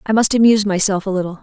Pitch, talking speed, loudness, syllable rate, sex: 200 Hz, 255 wpm, -15 LUFS, 7.5 syllables/s, female